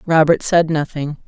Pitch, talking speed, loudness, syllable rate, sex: 155 Hz, 140 wpm, -16 LUFS, 4.6 syllables/s, female